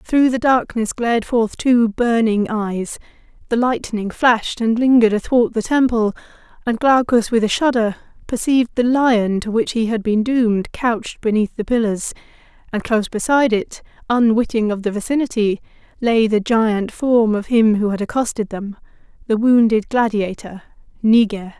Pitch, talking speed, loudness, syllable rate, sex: 225 Hz, 145 wpm, -17 LUFS, 4.9 syllables/s, female